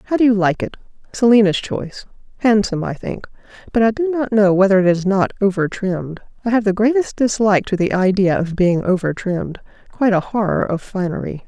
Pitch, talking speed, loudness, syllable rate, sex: 200 Hz, 185 wpm, -17 LUFS, 5.9 syllables/s, female